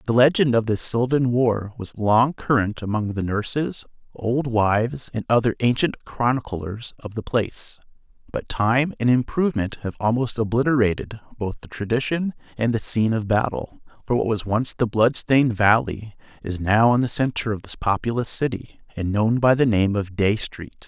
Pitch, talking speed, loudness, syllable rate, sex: 115 Hz, 175 wpm, -22 LUFS, 4.9 syllables/s, male